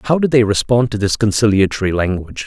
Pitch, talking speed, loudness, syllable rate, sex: 110 Hz, 195 wpm, -15 LUFS, 6.2 syllables/s, male